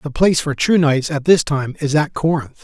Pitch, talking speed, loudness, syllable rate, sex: 150 Hz, 250 wpm, -17 LUFS, 5.3 syllables/s, male